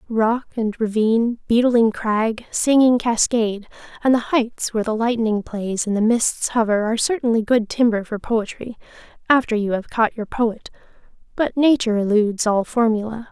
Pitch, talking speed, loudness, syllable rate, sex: 225 Hz, 150 wpm, -19 LUFS, 4.9 syllables/s, female